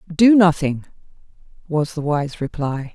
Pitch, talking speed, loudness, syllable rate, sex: 160 Hz, 120 wpm, -19 LUFS, 4.1 syllables/s, female